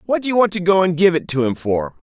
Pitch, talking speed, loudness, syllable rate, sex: 175 Hz, 320 wpm, -17 LUFS, 5.9 syllables/s, male